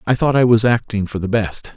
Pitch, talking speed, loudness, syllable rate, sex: 115 Hz, 275 wpm, -17 LUFS, 5.7 syllables/s, male